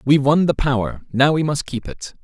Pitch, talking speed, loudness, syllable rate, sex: 140 Hz, 240 wpm, -19 LUFS, 5.6 syllables/s, male